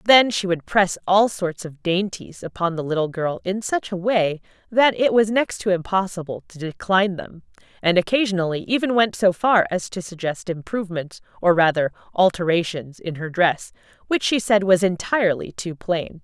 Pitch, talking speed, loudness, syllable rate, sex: 185 Hz, 175 wpm, -21 LUFS, 5.0 syllables/s, female